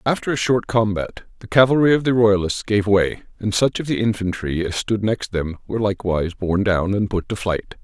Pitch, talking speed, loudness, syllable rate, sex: 105 Hz, 215 wpm, -20 LUFS, 5.5 syllables/s, male